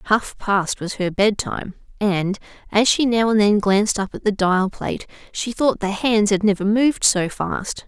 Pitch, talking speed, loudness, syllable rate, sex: 205 Hz, 200 wpm, -19 LUFS, 4.7 syllables/s, female